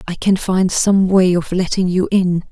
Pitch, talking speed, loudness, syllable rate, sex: 185 Hz, 215 wpm, -15 LUFS, 4.3 syllables/s, female